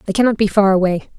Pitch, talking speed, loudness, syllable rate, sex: 200 Hz, 255 wpm, -15 LUFS, 7.9 syllables/s, female